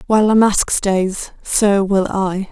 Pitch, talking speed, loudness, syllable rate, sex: 200 Hz, 165 wpm, -16 LUFS, 3.6 syllables/s, female